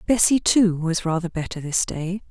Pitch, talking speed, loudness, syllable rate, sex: 180 Hz, 180 wpm, -21 LUFS, 4.7 syllables/s, female